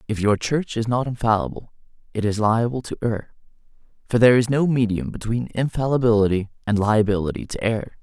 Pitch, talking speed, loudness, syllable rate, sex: 115 Hz, 165 wpm, -21 LUFS, 5.9 syllables/s, male